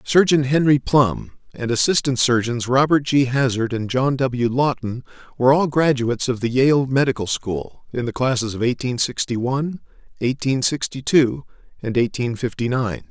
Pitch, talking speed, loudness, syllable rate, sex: 125 Hz, 160 wpm, -20 LUFS, 4.8 syllables/s, male